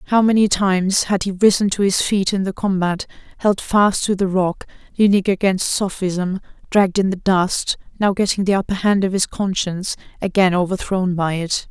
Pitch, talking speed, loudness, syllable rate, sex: 190 Hz, 185 wpm, -18 LUFS, 5.0 syllables/s, female